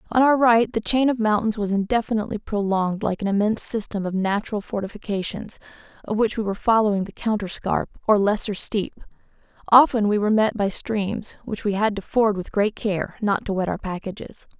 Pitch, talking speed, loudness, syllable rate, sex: 210 Hz, 195 wpm, -22 LUFS, 5.7 syllables/s, female